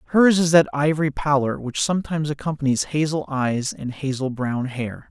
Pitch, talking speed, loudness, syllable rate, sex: 145 Hz, 165 wpm, -21 LUFS, 5.2 syllables/s, male